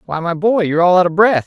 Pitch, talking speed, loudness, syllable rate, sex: 180 Hz, 370 wpm, -14 LUFS, 7.5 syllables/s, male